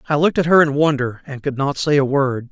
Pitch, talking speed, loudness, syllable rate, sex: 140 Hz, 285 wpm, -17 LUFS, 6.1 syllables/s, male